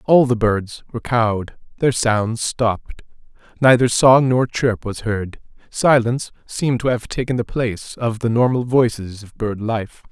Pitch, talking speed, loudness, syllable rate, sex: 115 Hz, 160 wpm, -18 LUFS, 4.5 syllables/s, male